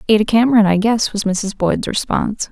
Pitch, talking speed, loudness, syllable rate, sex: 210 Hz, 190 wpm, -16 LUFS, 5.6 syllables/s, female